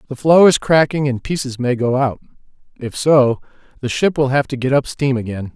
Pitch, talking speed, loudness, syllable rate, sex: 135 Hz, 205 wpm, -16 LUFS, 5.3 syllables/s, male